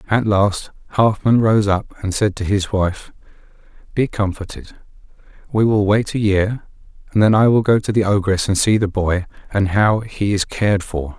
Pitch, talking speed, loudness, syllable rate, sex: 100 Hz, 190 wpm, -17 LUFS, 4.7 syllables/s, male